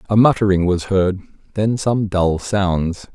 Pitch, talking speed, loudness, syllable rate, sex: 95 Hz, 155 wpm, -18 LUFS, 3.9 syllables/s, male